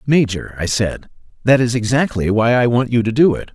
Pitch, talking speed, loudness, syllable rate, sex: 120 Hz, 220 wpm, -16 LUFS, 5.3 syllables/s, male